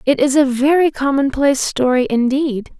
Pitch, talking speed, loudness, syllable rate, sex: 270 Hz, 150 wpm, -15 LUFS, 4.9 syllables/s, female